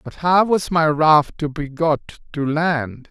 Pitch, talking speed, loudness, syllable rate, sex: 155 Hz, 195 wpm, -18 LUFS, 3.5 syllables/s, male